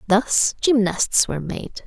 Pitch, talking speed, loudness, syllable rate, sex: 215 Hz, 130 wpm, -19 LUFS, 3.7 syllables/s, female